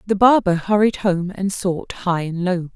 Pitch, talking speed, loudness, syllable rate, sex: 190 Hz, 195 wpm, -19 LUFS, 4.2 syllables/s, female